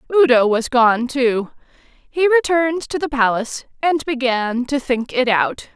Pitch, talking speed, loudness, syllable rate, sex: 260 Hz, 155 wpm, -17 LUFS, 4.3 syllables/s, female